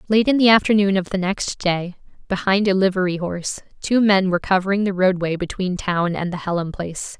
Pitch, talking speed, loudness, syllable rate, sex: 190 Hz, 200 wpm, -19 LUFS, 5.7 syllables/s, female